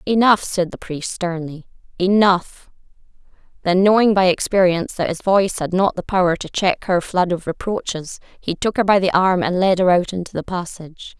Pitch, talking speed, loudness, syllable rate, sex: 185 Hz, 195 wpm, -18 LUFS, 5.2 syllables/s, female